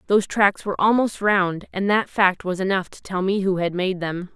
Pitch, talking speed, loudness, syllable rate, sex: 190 Hz, 235 wpm, -21 LUFS, 5.1 syllables/s, female